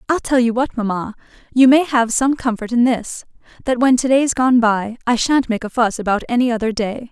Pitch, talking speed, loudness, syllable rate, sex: 240 Hz, 220 wpm, -17 LUFS, 5.3 syllables/s, female